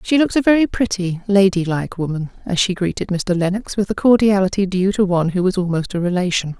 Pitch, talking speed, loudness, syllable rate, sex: 190 Hz, 220 wpm, -18 LUFS, 6.1 syllables/s, female